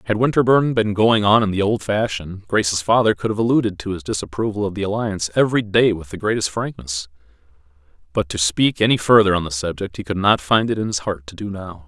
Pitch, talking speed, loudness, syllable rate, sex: 100 Hz, 225 wpm, -19 LUFS, 6.1 syllables/s, male